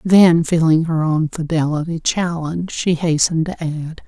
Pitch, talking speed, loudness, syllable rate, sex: 165 Hz, 145 wpm, -17 LUFS, 4.6 syllables/s, female